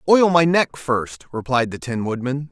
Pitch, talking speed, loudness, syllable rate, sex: 135 Hz, 190 wpm, -20 LUFS, 4.4 syllables/s, male